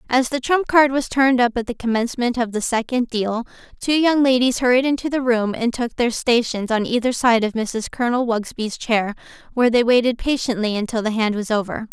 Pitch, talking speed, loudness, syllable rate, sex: 240 Hz, 210 wpm, -19 LUFS, 5.6 syllables/s, female